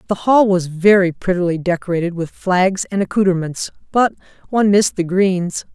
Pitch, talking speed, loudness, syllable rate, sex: 185 Hz, 155 wpm, -17 LUFS, 5.3 syllables/s, female